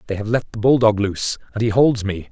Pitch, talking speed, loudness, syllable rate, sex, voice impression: 110 Hz, 285 wpm, -18 LUFS, 6.0 syllables/s, male, masculine, adult-like, tensed, powerful, slightly bright, clear, fluent, cool, intellectual, calm, mature, friendly, slightly reassuring, wild, lively, kind